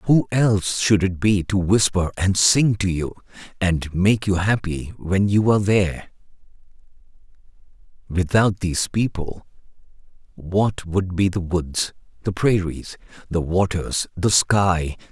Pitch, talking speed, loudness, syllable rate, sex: 95 Hz, 140 wpm, -20 LUFS, 4.1 syllables/s, male